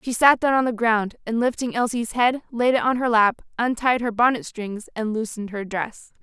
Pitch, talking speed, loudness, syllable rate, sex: 230 Hz, 220 wpm, -22 LUFS, 5.1 syllables/s, female